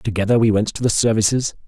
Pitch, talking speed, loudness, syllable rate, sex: 110 Hz, 215 wpm, -18 LUFS, 6.5 syllables/s, male